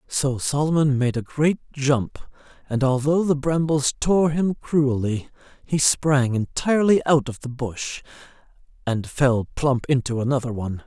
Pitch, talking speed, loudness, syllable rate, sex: 135 Hz, 145 wpm, -22 LUFS, 4.3 syllables/s, male